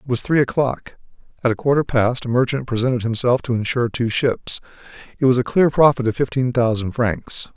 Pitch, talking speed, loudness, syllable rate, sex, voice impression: 125 Hz, 200 wpm, -19 LUFS, 5.6 syllables/s, male, masculine, slightly middle-aged, slightly relaxed, bright, soft, slightly muffled, raspy, cool, calm, mature, friendly, reassuring, wild, slightly lively, kind